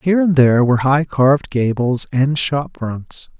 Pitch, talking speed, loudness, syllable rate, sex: 135 Hz, 175 wpm, -16 LUFS, 4.6 syllables/s, male